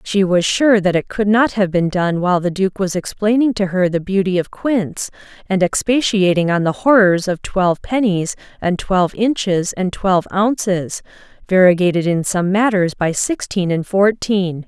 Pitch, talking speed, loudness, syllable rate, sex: 190 Hz, 170 wpm, -16 LUFS, 4.7 syllables/s, female